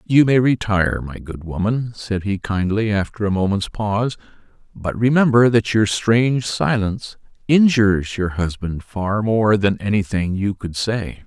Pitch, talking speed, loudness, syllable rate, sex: 105 Hz, 155 wpm, -19 LUFS, 4.5 syllables/s, male